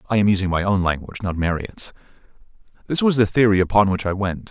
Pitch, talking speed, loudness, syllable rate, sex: 100 Hz, 215 wpm, -20 LUFS, 3.8 syllables/s, male